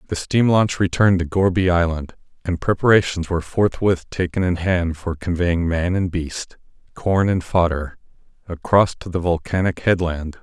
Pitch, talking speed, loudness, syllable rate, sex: 90 Hz, 155 wpm, -20 LUFS, 4.8 syllables/s, male